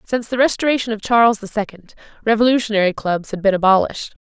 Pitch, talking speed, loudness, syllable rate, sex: 215 Hz, 170 wpm, -17 LUFS, 6.9 syllables/s, female